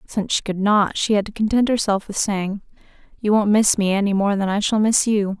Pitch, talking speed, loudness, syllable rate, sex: 205 Hz, 245 wpm, -19 LUFS, 5.6 syllables/s, female